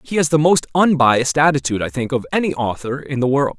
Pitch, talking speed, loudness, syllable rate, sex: 140 Hz, 235 wpm, -17 LUFS, 6.3 syllables/s, male